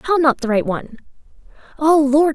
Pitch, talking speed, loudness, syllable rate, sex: 285 Hz, 180 wpm, -17 LUFS, 5.1 syllables/s, female